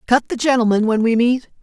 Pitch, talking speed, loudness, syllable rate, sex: 235 Hz, 220 wpm, -17 LUFS, 5.7 syllables/s, female